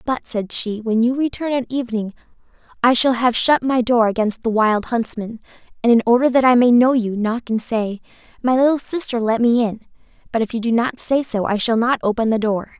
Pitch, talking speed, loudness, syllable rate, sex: 235 Hz, 225 wpm, -18 LUFS, 5.5 syllables/s, female